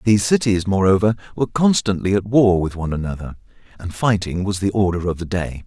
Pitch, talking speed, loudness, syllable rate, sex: 100 Hz, 190 wpm, -19 LUFS, 6.1 syllables/s, male